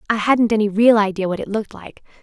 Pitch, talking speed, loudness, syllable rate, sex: 215 Hz, 240 wpm, -17 LUFS, 6.4 syllables/s, female